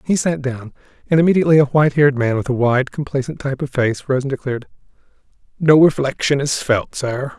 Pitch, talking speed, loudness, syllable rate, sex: 135 Hz, 195 wpm, -17 LUFS, 6.5 syllables/s, male